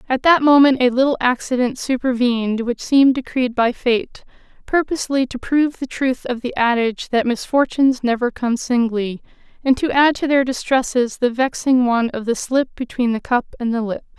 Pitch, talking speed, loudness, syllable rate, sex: 250 Hz, 180 wpm, -18 LUFS, 5.3 syllables/s, female